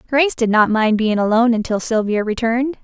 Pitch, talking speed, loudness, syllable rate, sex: 230 Hz, 190 wpm, -17 LUFS, 6.1 syllables/s, female